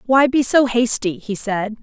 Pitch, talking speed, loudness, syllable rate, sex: 235 Hz, 200 wpm, -17 LUFS, 4.2 syllables/s, female